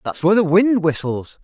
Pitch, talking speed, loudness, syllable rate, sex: 175 Hz, 210 wpm, -17 LUFS, 5.3 syllables/s, male